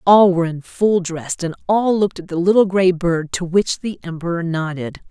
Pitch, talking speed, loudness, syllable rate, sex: 180 Hz, 210 wpm, -18 LUFS, 5.2 syllables/s, female